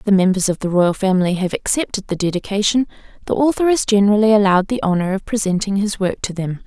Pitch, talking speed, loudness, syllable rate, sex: 200 Hz, 215 wpm, -17 LUFS, 6.6 syllables/s, female